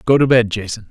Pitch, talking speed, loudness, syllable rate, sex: 110 Hz, 265 wpm, -15 LUFS, 6.3 syllables/s, male